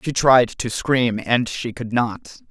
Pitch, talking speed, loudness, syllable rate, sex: 120 Hz, 190 wpm, -19 LUFS, 3.4 syllables/s, male